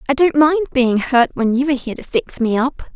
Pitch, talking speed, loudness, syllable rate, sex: 265 Hz, 265 wpm, -17 LUFS, 5.6 syllables/s, female